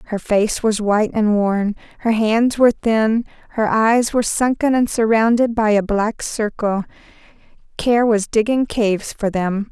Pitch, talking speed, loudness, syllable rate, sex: 220 Hz, 155 wpm, -17 LUFS, 4.5 syllables/s, female